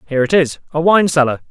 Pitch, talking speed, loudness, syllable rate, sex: 155 Hz, 200 wpm, -14 LUFS, 6.7 syllables/s, male